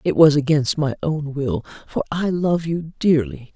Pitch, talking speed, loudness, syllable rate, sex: 145 Hz, 185 wpm, -20 LUFS, 4.2 syllables/s, male